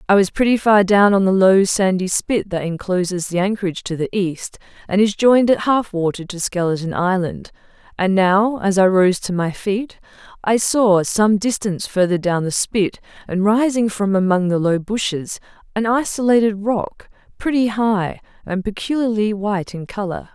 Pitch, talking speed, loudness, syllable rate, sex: 200 Hz, 170 wpm, -18 LUFS, 4.8 syllables/s, female